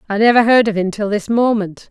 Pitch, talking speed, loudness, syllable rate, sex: 215 Hz, 250 wpm, -15 LUFS, 5.8 syllables/s, female